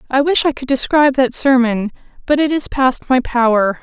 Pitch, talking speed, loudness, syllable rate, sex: 260 Hz, 205 wpm, -15 LUFS, 5.2 syllables/s, female